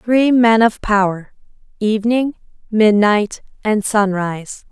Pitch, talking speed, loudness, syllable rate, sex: 215 Hz, 100 wpm, -16 LUFS, 4.1 syllables/s, female